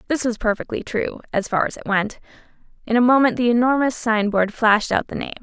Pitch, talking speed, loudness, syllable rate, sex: 230 Hz, 210 wpm, -20 LUFS, 6.0 syllables/s, female